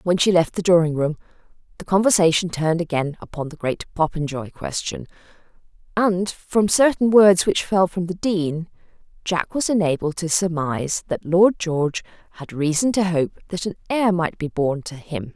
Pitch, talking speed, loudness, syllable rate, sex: 175 Hz, 170 wpm, -20 LUFS, 4.9 syllables/s, female